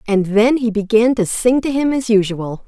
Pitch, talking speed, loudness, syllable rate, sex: 225 Hz, 225 wpm, -16 LUFS, 4.8 syllables/s, female